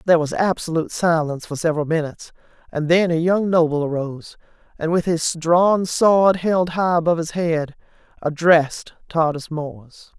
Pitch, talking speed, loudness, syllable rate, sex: 165 Hz, 155 wpm, -19 LUFS, 5.1 syllables/s, female